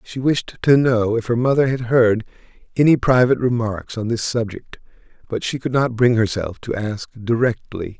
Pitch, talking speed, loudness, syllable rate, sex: 120 Hz, 180 wpm, -19 LUFS, 4.9 syllables/s, male